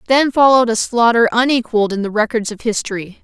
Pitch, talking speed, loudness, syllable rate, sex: 230 Hz, 185 wpm, -15 LUFS, 6.4 syllables/s, female